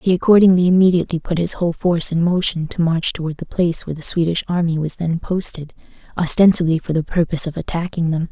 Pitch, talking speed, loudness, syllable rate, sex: 170 Hz, 200 wpm, -18 LUFS, 6.5 syllables/s, female